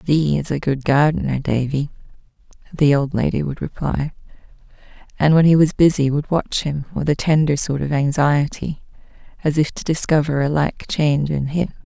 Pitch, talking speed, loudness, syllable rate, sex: 145 Hz, 170 wpm, -19 LUFS, 5.0 syllables/s, female